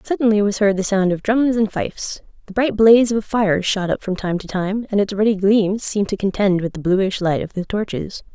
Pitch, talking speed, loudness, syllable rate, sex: 205 Hz, 250 wpm, -18 LUFS, 5.5 syllables/s, female